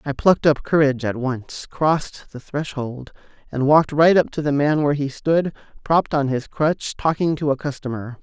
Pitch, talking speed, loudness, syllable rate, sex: 145 Hz, 195 wpm, -20 LUFS, 5.1 syllables/s, male